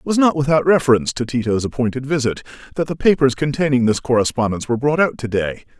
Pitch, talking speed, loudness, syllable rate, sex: 130 Hz, 205 wpm, -18 LUFS, 6.8 syllables/s, male